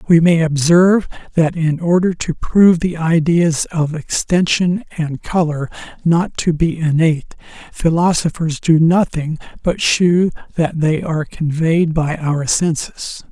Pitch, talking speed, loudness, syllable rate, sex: 165 Hz, 135 wpm, -16 LUFS, 4.1 syllables/s, male